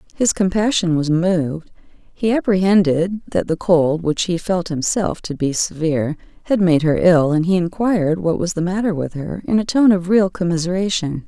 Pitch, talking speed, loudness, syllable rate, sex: 175 Hz, 185 wpm, -18 LUFS, 4.9 syllables/s, female